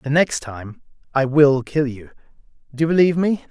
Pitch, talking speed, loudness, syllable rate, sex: 145 Hz, 190 wpm, -18 LUFS, 5.2 syllables/s, male